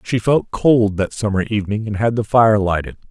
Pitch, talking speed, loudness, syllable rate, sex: 110 Hz, 215 wpm, -17 LUFS, 5.2 syllables/s, male